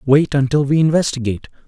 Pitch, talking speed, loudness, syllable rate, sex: 140 Hz, 145 wpm, -16 LUFS, 6.5 syllables/s, male